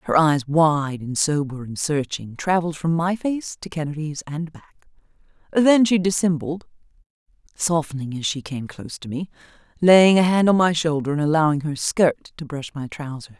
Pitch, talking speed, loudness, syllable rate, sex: 155 Hz, 175 wpm, -21 LUFS, 5.1 syllables/s, female